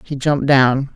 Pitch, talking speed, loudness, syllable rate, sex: 135 Hz, 190 wpm, -15 LUFS, 4.7 syllables/s, female